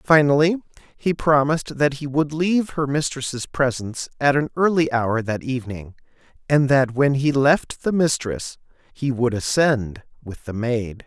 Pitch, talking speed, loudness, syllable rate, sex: 135 Hz, 155 wpm, -21 LUFS, 4.4 syllables/s, male